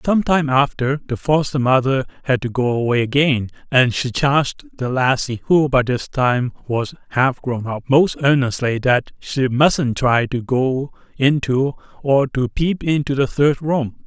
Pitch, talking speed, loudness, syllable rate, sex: 135 Hz, 170 wpm, -18 LUFS, 4.1 syllables/s, male